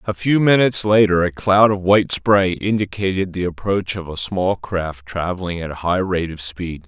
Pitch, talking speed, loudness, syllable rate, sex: 95 Hz, 200 wpm, -18 LUFS, 4.9 syllables/s, male